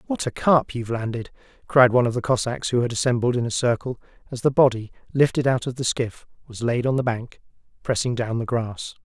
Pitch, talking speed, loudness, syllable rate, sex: 120 Hz, 220 wpm, -22 LUFS, 5.9 syllables/s, male